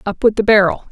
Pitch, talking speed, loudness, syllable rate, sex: 210 Hz, 265 wpm, -14 LUFS, 6.4 syllables/s, female